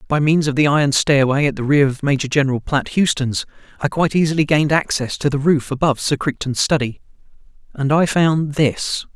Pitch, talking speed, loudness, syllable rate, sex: 145 Hz, 190 wpm, -17 LUFS, 5.7 syllables/s, male